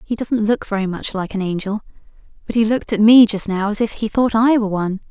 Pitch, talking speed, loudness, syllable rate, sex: 210 Hz, 260 wpm, -17 LUFS, 6.3 syllables/s, female